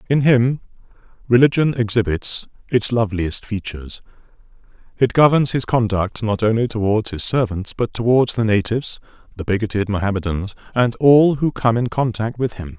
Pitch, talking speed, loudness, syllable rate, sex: 115 Hz, 145 wpm, -18 LUFS, 5.2 syllables/s, male